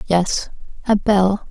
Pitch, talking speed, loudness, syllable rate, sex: 195 Hz, 120 wpm, -18 LUFS, 3.1 syllables/s, female